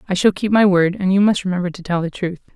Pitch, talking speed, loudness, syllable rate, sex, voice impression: 185 Hz, 305 wpm, -17 LUFS, 6.7 syllables/s, female, feminine, adult-like, tensed, dark, clear, halting, intellectual, calm, modest